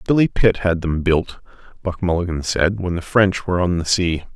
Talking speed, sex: 205 wpm, male